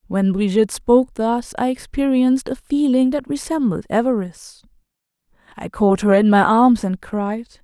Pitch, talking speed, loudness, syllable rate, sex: 230 Hz, 150 wpm, -18 LUFS, 4.9 syllables/s, female